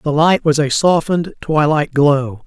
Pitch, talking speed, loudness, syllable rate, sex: 150 Hz, 170 wpm, -15 LUFS, 4.4 syllables/s, male